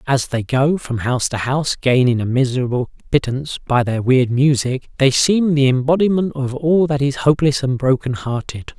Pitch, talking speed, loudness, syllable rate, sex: 135 Hz, 185 wpm, -17 LUFS, 5.2 syllables/s, male